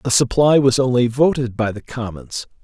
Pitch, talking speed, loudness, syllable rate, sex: 125 Hz, 180 wpm, -17 LUFS, 5.0 syllables/s, male